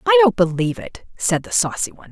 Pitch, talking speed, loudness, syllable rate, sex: 225 Hz, 225 wpm, -18 LUFS, 6.6 syllables/s, female